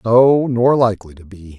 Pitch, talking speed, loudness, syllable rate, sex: 110 Hz, 190 wpm, -14 LUFS, 4.7 syllables/s, male